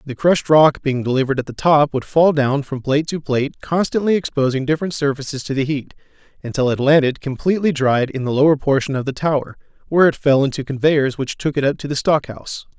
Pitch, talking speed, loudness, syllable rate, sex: 145 Hz, 220 wpm, -18 LUFS, 6.2 syllables/s, male